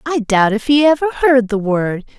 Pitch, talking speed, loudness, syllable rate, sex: 245 Hz, 220 wpm, -14 LUFS, 5.0 syllables/s, female